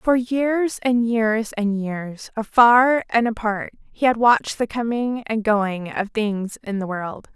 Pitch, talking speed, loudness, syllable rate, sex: 225 Hz, 170 wpm, -20 LUFS, 3.7 syllables/s, female